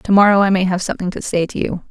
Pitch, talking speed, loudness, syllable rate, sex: 185 Hz, 315 wpm, -16 LUFS, 7.1 syllables/s, female